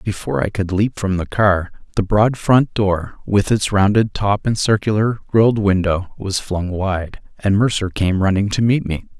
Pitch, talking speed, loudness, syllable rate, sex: 100 Hz, 190 wpm, -18 LUFS, 4.6 syllables/s, male